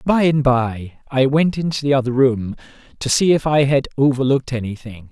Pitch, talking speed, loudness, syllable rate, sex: 135 Hz, 190 wpm, -18 LUFS, 5.2 syllables/s, male